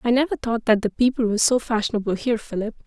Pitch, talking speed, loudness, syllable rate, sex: 225 Hz, 230 wpm, -22 LUFS, 7.1 syllables/s, female